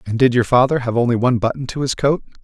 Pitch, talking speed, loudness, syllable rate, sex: 125 Hz, 270 wpm, -17 LUFS, 7.0 syllables/s, male